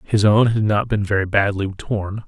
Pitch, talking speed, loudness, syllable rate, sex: 105 Hz, 210 wpm, -19 LUFS, 4.7 syllables/s, male